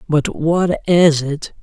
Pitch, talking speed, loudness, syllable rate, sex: 160 Hz, 150 wpm, -16 LUFS, 3.1 syllables/s, male